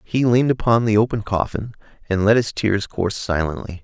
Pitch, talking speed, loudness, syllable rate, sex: 105 Hz, 190 wpm, -19 LUFS, 5.6 syllables/s, male